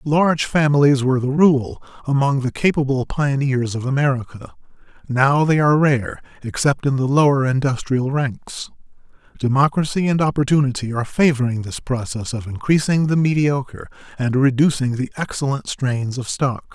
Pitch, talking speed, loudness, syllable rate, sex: 135 Hz, 140 wpm, -19 LUFS, 5.0 syllables/s, male